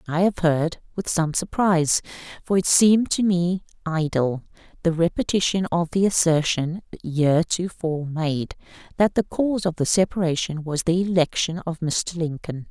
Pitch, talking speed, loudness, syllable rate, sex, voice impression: 170 Hz, 145 wpm, -22 LUFS, 4.8 syllables/s, female, very feminine, middle-aged, thin, slightly tensed, slightly weak, slightly bright, soft, very clear, fluent, cute, intellectual, refreshing, sincere, very calm, very friendly, reassuring, slightly unique, very elegant, sweet, lively, very kind, modest, light